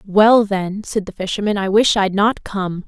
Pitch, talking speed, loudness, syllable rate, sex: 200 Hz, 210 wpm, -17 LUFS, 4.4 syllables/s, female